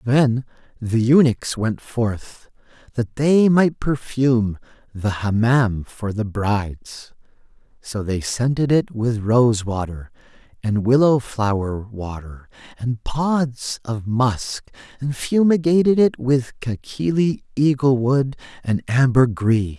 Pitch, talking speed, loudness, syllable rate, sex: 120 Hz, 110 wpm, -20 LUFS, 3.6 syllables/s, male